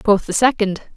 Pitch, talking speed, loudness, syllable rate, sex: 205 Hz, 190 wpm, -17 LUFS, 5.5 syllables/s, female